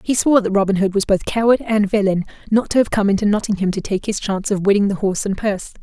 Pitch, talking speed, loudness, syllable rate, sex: 205 Hz, 270 wpm, -18 LUFS, 6.9 syllables/s, female